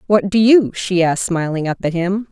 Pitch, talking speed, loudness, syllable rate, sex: 190 Hz, 235 wpm, -16 LUFS, 5.3 syllables/s, female